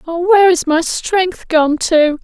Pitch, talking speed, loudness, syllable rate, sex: 340 Hz, 190 wpm, -13 LUFS, 3.8 syllables/s, female